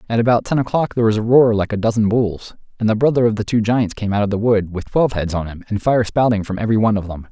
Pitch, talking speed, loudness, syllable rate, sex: 110 Hz, 305 wpm, -17 LUFS, 6.9 syllables/s, male